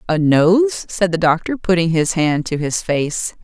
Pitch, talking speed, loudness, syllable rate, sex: 160 Hz, 190 wpm, -17 LUFS, 4.1 syllables/s, female